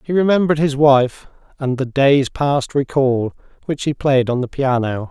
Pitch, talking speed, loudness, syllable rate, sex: 135 Hz, 175 wpm, -17 LUFS, 4.6 syllables/s, male